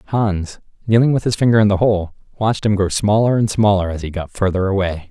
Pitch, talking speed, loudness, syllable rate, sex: 100 Hz, 225 wpm, -17 LUFS, 5.7 syllables/s, male